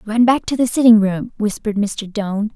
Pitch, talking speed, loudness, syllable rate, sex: 215 Hz, 210 wpm, -17 LUFS, 5.5 syllables/s, female